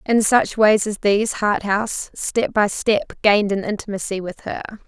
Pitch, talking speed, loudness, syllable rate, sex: 210 Hz, 170 wpm, -19 LUFS, 4.8 syllables/s, female